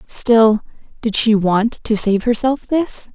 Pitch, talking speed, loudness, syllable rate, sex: 225 Hz, 150 wpm, -16 LUFS, 3.4 syllables/s, female